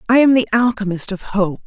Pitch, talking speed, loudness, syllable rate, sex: 215 Hz, 215 wpm, -17 LUFS, 5.8 syllables/s, female